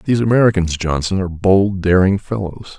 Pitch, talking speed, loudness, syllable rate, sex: 95 Hz, 150 wpm, -16 LUFS, 5.5 syllables/s, male